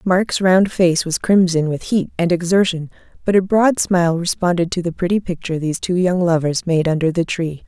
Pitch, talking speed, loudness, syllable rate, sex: 175 Hz, 205 wpm, -17 LUFS, 5.3 syllables/s, female